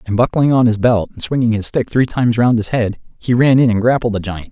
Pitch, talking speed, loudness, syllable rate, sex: 115 Hz, 280 wpm, -15 LUFS, 5.9 syllables/s, male